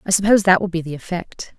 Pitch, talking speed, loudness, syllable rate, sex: 185 Hz, 265 wpm, -18 LUFS, 6.8 syllables/s, female